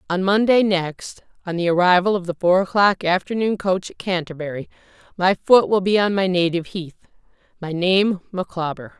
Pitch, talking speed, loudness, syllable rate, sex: 185 Hz, 160 wpm, -19 LUFS, 5.1 syllables/s, female